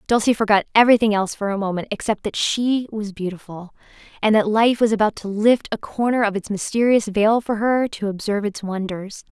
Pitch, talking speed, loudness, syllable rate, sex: 215 Hz, 200 wpm, -20 LUFS, 5.7 syllables/s, female